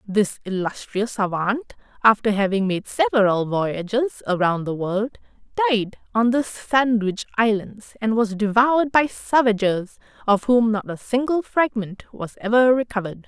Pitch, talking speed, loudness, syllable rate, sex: 220 Hz, 135 wpm, -21 LUFS, 4.5 syllables/s, female